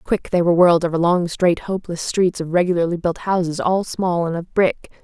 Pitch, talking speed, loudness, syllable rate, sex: 175 Hz, 215 wpm, -19 LUFS, 5.6 syllables/s, female